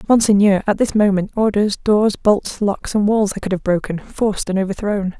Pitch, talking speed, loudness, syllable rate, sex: 205 Hz, 195 wpm, -17 LUFS, 5.1 syllables/s, female